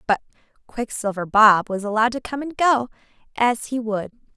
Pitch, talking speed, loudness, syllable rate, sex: 225 Hz, 165 wpm, -21 LUFS, 5.3 syllables/s, female